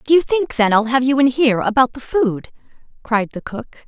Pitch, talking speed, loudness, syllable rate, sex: 250 Hz, 230 wpm, -17 LUFS, 5.3 syllables/s, female